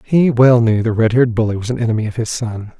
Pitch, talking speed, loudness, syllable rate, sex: 115 Hz, 280 wpm, -15 LUFS, 6.4 syllables/s, male